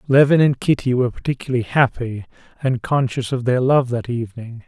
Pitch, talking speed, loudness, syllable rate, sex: 125 Hz, 165 wpm, -19 LUFS, 5.8 syllables/s, male